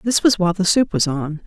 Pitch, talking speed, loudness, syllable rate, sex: 185 Hz, 285 wpm, -18 LUFS, 5.9 syllables/s, female